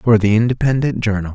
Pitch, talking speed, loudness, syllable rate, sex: 110 Hz, 180 wpm, -16 LUFS, 6.1 syllables/s, male